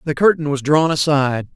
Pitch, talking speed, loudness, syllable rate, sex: 145 Hz, 195 wpm, -17 LUFS, 5.8 syllables/s, male